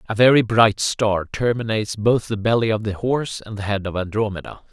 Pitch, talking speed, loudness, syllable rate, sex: 110 Hz, 205 wpm, -20 LUFS, 5.7 syllables/s, male